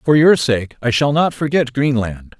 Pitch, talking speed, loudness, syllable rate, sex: 130 Hz, 200 wpm, -16 LUFS, 4.5 syllables/s, male